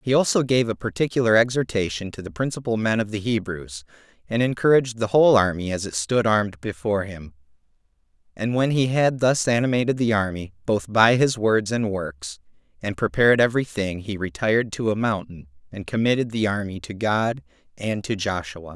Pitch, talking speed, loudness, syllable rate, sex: 110 Hz, 180 wpm, -22 LUFS, 5.5 syllables/s, male